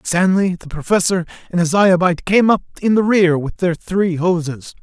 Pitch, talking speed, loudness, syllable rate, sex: 180 Hz, 185 wpm, -16 LUFS, 5.1 syllables/s, male